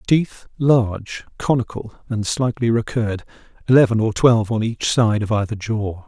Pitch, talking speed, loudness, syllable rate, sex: 115 Hz, 150 wpm, -19 LUFS, 4.9 syllables/s, male